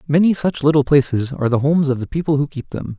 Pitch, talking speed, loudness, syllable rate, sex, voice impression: 145 Hz, 260 wpm, -18 LUFS, 6.7 syllables/s, male, masculine, adult-like, slightly thick, slightly relaxed, slightly dark, muffled, cool, calm, slightly mature, slightly friendly, reassuring, kind, modest